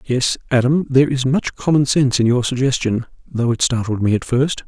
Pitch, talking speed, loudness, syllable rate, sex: 125 Hz, 205 wpm, -17 LUFS, 5.5 syllables/s, male